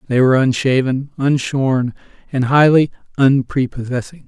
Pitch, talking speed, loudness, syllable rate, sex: 130 Hz, 100 wpm, -16 LUFS, 4.7 syllables/s, male